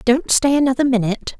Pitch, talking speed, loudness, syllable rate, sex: 255 Hz, 175 wpm, -17 LUFS, 6.2 syllables/s, female